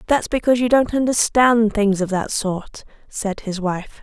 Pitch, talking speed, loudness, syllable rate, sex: 220 Hz, 180 wpm, -19 LUFS, 4.4 syllables/s, female